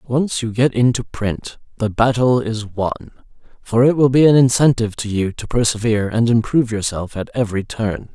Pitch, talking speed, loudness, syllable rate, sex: 115 Hz, 185 wpm, -17 LUFS, 5.1 syllables/s, male